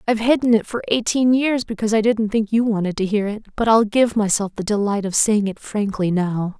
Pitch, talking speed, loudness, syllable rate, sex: 215 Hz, 235 wpm, -19 LUFS, 5.6 syllables/s, female